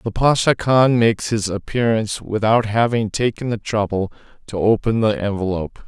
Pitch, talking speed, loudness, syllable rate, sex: 110 Hz, 155 wpm, -19 LUFS, 5.1 syllables/s, male